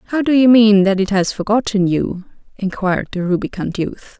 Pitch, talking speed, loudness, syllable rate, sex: 205 Hz, 185 wpm, -16 LUFS, 5.3 syllables/s, female